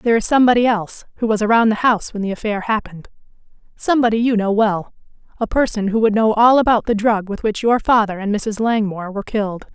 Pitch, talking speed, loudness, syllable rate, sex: 215 Hz, 210 wpm, -17 LUFS, 6.6 syllables/s, female